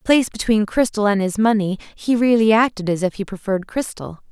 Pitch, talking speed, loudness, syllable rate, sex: 210 Hz, 195 wpm, -19 LUFS, 5.7 syllables/s, female